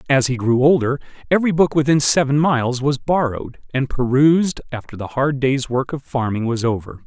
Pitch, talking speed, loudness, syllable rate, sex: 135 Hz, 185 wpm, -18 LUFS, 5.6 syllables/s, male